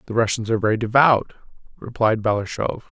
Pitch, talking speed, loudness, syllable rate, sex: 115 Hz, 140 wpm, -20 LUFS, 6.1 syllables/s, male